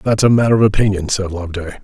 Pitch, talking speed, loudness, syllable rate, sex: 100 Hz, 230 wpm, -15 LUFS, 7.9 syllables/s, male